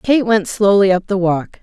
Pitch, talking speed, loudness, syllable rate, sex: 195 Hz, 220 wpm, -15 LUFS, 4.6 syllables/s, female